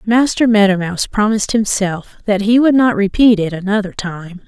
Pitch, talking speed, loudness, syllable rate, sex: 205 Hz, 175 wpm, -14 LUFS, 5.2 syllables/s, female